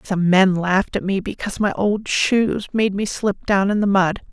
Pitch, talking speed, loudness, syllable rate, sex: 200 Hz, 220 wpm, -19 LUFS, 4.6 syllables/s, female